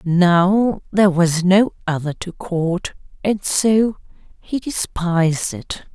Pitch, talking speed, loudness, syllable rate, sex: 185 Hz, 120 wpm, -18 LUFS, 3.3 syllables/s, female